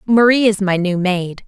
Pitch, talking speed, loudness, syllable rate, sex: 200 Hz, 205 wpm, -15 LUFS, 4.5 syllables/s, female